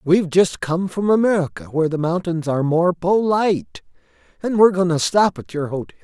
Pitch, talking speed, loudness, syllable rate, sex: 170 Hz, 190 wpm, -19 LUFS, 5.7 syllables/s, male